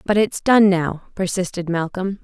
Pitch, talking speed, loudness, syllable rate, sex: 190 Hz, 160 wpm, -19 LUFS, 4.4 syllables/s, female